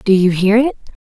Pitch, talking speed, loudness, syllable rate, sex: 210 Hz, 225 wpm, -14 LUFS, 5.7 syllables/s, female